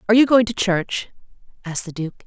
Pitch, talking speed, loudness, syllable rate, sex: 205 Hz, 210 wpm, -20 LUFS, 6.9 syllables/s, female